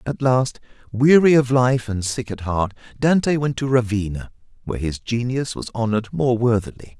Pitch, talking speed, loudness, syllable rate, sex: 120 Hz, 170 wpm, -20 LUFS, 5.1 syllables/s, male